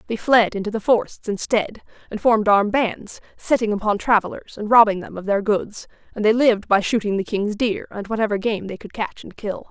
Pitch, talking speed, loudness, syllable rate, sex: 210 Hz, 215 wpm, -20 LUFS, 5.6 syllables/s, female